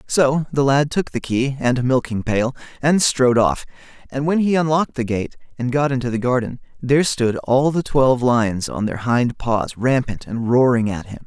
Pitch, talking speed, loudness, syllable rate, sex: 130 Hz, 210 wpm, -19 LUFS, 5.0 syllables/s, male